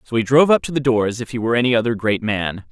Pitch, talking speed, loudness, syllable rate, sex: 115 Hz, 330 wpm, -18 LUFS, 7.3 syllables/s, male